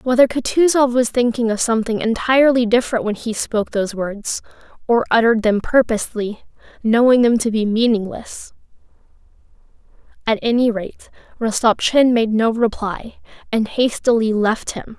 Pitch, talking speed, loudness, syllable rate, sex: 230 Hz, 130 wpm, -17 LUFS, 5.1 syllables/s, female